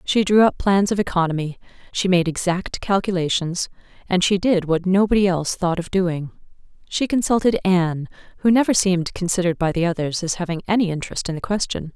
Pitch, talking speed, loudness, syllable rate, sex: 180 Hz, 180 wpm, -20 LUFS, 5.9 syllables/s, female